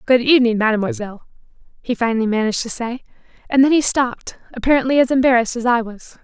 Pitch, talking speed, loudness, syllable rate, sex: 245 Hz, 175 wpm, -17 LUFS, 7.2 syllables/s, female